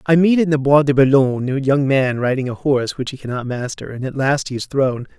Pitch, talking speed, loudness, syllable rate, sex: 135 Hz, 265 wpm, -17 LUFS, 5.8 syllables/s, male